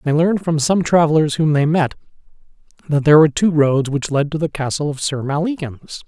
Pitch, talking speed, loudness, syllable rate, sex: 155 Hz, 210 wpm, -17 LUFS, 5.9 syllables/s, male